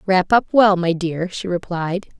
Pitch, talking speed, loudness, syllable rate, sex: 180 Hz, 190 wpm, -18 LUFS, 4.2 syllables/s, female